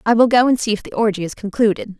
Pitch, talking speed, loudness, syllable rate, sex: 215 Hz, 300 wpm, -17 LUFS, 7.0 syllables/s, female